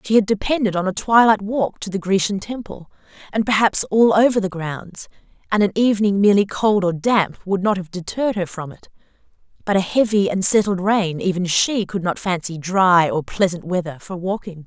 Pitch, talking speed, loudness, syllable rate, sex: 195 Hz, 195 wpm, -19 LUFS, 5.3 syllables/s, female